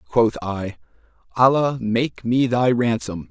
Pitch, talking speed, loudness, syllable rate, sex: 120 Hz, 125 wpm, -20 LUFS, 3.4 syllables/s, male